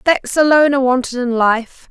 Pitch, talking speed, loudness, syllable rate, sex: 260 Hz, 190 wpm, -14 LUFS, 5.6 syllables/s, female